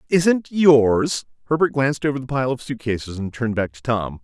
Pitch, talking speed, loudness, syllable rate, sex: 130 Hz, 200 wpm, -20 LUFS, 5.3 syllables/s, male